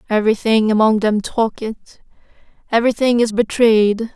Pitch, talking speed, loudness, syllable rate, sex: 220 Hz, 100 wpm, -16 LUFS, 5.0 syllables/s, female